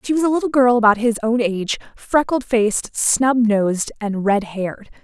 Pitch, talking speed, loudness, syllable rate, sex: 230 Hz, 190 wpm, -18 LUFS, 5.1 syllables/s, female